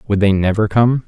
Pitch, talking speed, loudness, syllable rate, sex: 105 Hz, 225 wpm, -15 LUFS, 5.4 syllables/s, male